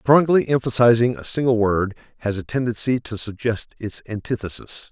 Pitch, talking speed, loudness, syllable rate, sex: 115 Hz, 145 wpm, -21 LUFS, 5.1 syllables/s, male